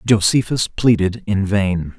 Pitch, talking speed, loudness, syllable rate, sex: 100 Hz, 120 wpm, -17 LUFS, 3.9 syllables/s, male